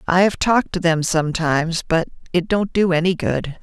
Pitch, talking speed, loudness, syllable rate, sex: 170 Hz, 200 wpm, -19 LUFS, 5.4 syllables/s, female